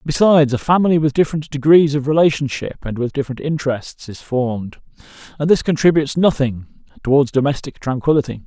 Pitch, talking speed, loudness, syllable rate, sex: 140 Hz, 150 wpm, -17 LUFS, 6.1 syllables/s, male